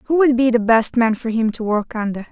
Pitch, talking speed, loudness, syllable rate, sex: 235 Hz, 285 wpm, -17 LUFS, 5.3 syllables/s, female